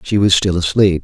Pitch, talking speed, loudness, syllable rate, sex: 95 Hz, 235 wpm, -14 LUFS, 5.1 syllables/s, male